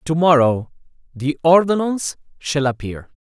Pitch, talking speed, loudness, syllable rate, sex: 150 Hz, 110 wpm, -18 LUFS, 4.7 syllables/s, male